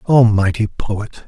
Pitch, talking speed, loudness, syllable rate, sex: 110 Hz, 140 wpm, -16 LUFS, 3.7 syllables/s, male